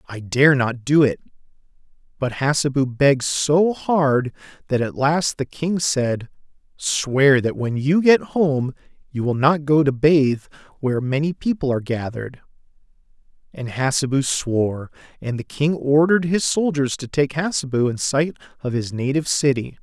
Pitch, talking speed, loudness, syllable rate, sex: 140 Hz, 155 wpm, -20 LUFS, 4.6 syllables/s, male